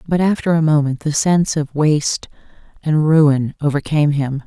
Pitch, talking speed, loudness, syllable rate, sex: 150 Hz, 160 wpm, -16 LUFS, 5.1 syllables/s, female